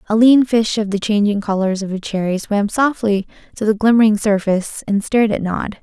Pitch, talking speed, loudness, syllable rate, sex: 210 Hz, 205 wpm, -17 LUFS, 5.5 syllables/s, female